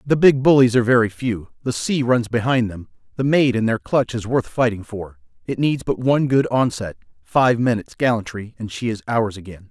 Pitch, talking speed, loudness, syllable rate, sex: 120 Hz, 210 wpm, -19 LUFS, 5.3 syllables/s, male